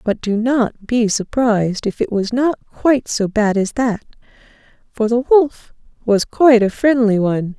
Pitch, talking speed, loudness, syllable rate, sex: 230 Hz, 175 wpm, -16 LUFS, 4.6 syllables/s, female